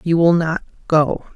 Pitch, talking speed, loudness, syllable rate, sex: 165 Hz, 175 wpm, -18 LUFS, 4.0 syllables/s, female